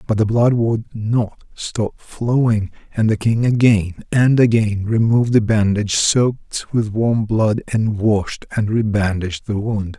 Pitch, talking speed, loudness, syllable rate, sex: 110 Hz, 155 wpm, -18 LUFS, 4.1 syllables/s, male